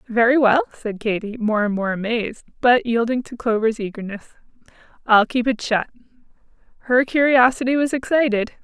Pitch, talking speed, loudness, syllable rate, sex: 235 Hz, 145 wpm, -19 LUFS, 5.3 syllables/s, female